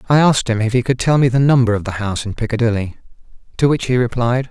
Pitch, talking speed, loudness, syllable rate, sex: 120 Hz, 255 wpm, -16 LUFS, 7.0 syllables/s, male